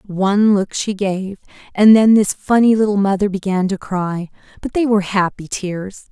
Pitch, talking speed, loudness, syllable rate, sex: 200 Hz, 175 wpm, -16 LUFS, 4.8 syllables/s, female